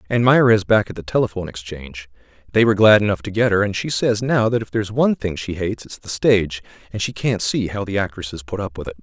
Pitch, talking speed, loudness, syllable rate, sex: 105 Hz, 260 wpm, -19 LUFS, 6.7 syllables/s, male